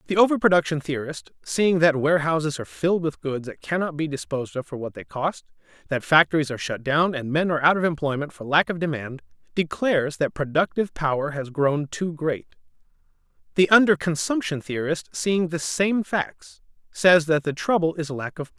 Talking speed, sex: 195 wpm, male